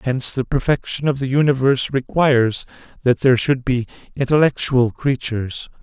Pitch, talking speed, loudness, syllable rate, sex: 130 Hz, 135 wpm, -18 LUFS, 5.5 syllables/s, male